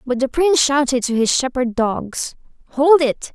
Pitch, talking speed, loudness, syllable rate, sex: 265 Hz, 180 wpm, -17 LUFS, 4.6 syllables/s, female